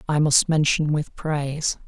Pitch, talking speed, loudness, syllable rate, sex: 150 Hz, 160 wpm, -21 LUFS, 4.2 syllables/s, male